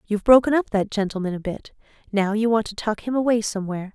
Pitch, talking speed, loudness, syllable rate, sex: 215 Hz, 230 wpm, -22 LUFS, 6.6 syllables/s, female